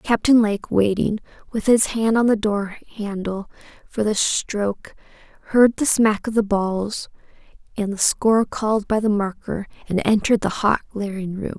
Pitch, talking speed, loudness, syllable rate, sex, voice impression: 210 Hz, 165 wpm, -20 LUFS, 4.6 syllables/s, female, very feminine, slightly young, very thin, very relaxed, very weak, very dark, very soft, very muffled, halting, raspy, very cute, very intellectual, slightly refreshing, sincere, very calm, very friendly, very reassuring, very unique, very elegant, slightly wild, very sweet, slightly lively, very kind, slightly sharp, very modest, light